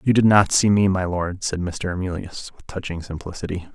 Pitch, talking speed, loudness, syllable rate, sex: 90 Hz, 210 wpm, -21 LUFS, 5.6 syllables/s, male